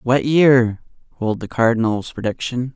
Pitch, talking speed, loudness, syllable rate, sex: 120 Hz, 130 wpm, -18 LUFS, 4.7 syllables/s, male